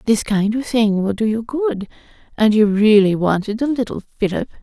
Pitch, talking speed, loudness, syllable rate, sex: 220 Hz, 195 wpm, -17 LUFS, 5.1 syllables/s, female